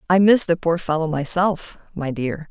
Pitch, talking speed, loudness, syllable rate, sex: 170 Hz, 190 wpm, -19 LUFS, 4.6 syllables/s, female